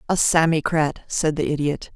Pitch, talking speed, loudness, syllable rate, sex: 155 Hz, 155 wpm, -21 LUFS, 4.7 syllables/s, female